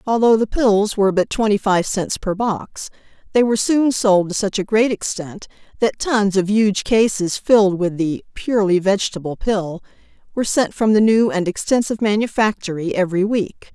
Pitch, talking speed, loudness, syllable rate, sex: 205 Hz, 175 wpm, -18 LUFS, 5.1 syllables/s, female